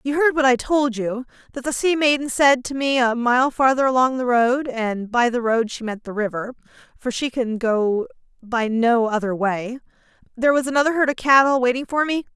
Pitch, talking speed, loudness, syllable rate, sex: 260 Hz, 205 wpm, -20 LUFS, 5.1 syllables/s, female